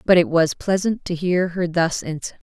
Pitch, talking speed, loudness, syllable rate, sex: 170 Hz, 215 wpm, -21 LUFS, 4.8 syllables/s, female